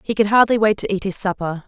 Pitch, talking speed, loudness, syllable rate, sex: 205 Hz, 285 wpm, -18 LUFS, 6.4 syllables/s, female